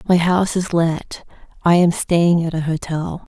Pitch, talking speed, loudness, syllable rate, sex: 170 Hz, 180 wpm, -18 LUFS, 4.3 syllables/s, female